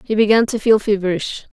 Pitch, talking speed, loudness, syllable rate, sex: 210 Hz, 195 wpm, -16 LUFS, 5.8 syllables/s, female